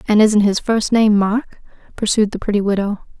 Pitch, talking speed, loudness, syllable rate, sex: 210 Hz, 190 wpm, -16 LUFS, 5.2 syllables/s, female